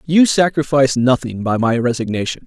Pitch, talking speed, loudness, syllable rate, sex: 130 Hz, 145 wpm, -16 LUFS, 5.5 syllables/s, male